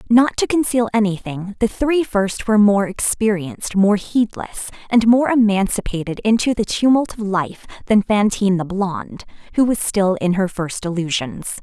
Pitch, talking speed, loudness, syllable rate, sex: 205 Hz, 160 wpm, -18 LUFS, 4.8 syllables/s, female